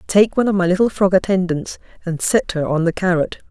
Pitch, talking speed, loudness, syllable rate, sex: 185 Hz, 220 wpm, -18 LUFS, 5.9 syllables/s, female